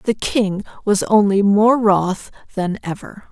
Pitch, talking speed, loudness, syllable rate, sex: 205 Hz, 145 wpm, -17 LUFS, 3.6 syllables/s, female